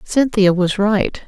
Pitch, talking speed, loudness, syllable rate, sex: 200 Hz, 140 wpm, -16 LUFS, 3.5 syllables/s, female